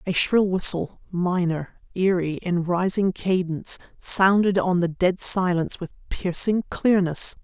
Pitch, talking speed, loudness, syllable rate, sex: 180 Hz, 115 wpm, -22 LUFS, 4.1 syllables/s, female